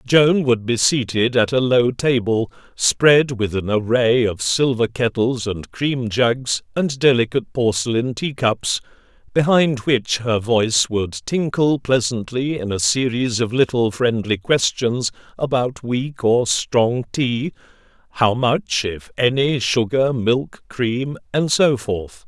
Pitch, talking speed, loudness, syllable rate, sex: 120 Hz, 140 wpm, -19 LUFS, 3.7 syllables/s, male